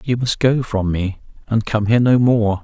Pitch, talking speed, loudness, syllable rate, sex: 115 Hz, 225 wpm, -17 LUFS, 4.8 syllables/s, male